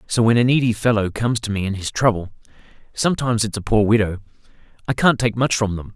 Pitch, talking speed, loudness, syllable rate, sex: 110 Hz, 200 wpm, -19 LUFS, 6.6 syllables/s, male